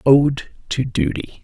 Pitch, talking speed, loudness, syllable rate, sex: 120 Hz, 125 wpm, -19 LUFS, 4.2 syllables/s, male